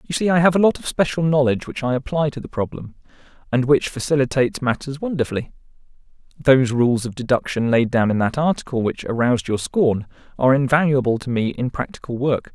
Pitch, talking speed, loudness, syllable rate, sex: 130 Hz, 190 wpm, -20 LUFS, 6.2 syllables/s, male